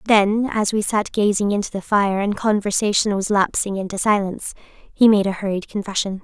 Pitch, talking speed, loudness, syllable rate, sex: 200 Hz, 185 wpm, -19 LUFS, 5.2 syllables/s, female